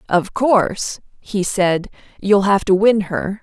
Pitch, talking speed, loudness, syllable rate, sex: 200 Hz, 160 wpm, -17 LUFS, 3.7 syllables/s, female